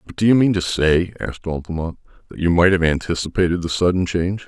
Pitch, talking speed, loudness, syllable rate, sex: 90 Hz, 215 wpm, -19 LUFS, 6.3 syllables/s, male